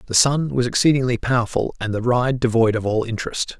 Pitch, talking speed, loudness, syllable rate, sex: 120 Hz, 200 wpm, -20 LUFS, 5.9 syllables/s, male